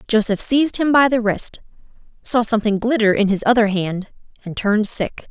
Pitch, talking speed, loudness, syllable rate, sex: 220 Hz, 180 wpm, -18 LUFS, 5.5 syllables/s, female